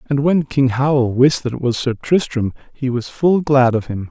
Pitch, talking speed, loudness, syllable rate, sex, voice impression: 130 Hz, 235 wpm, -17 LUFS, 4.9 syllables/s, male, very masculine, slightly old, thick, relaxed, powerful, bright, soft, clear, fluent, raspy, cool, intellectual, slightly refreshing, sincere, very calm, friendly, slightly reassuring, unique, slightly elegant, wild, slightly sweet, lively, kind, slightly intense